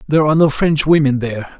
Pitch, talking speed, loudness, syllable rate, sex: 145 Hz, 225 wpm, -14 LUFS, 7.0 syllables/s, male